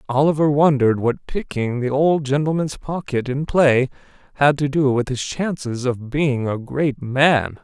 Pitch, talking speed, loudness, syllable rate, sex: 140 Hz, 165 wpm, -19 LUFS, 4.3 syllables/s, male